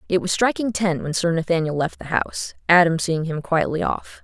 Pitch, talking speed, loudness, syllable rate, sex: 175 Hz, 210 wpm, -21 LUFS, 5.4 syllables/s, female